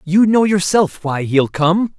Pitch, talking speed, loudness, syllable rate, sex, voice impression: 180 Hz, 180 wpm, -15 LUFS, 3.7 syllables/s, male, masculine, adult-like, tensed, powerful, bright, clear, fluent, slightly intellectual, slightly refreshing, friendly, slightly unique, lively, kind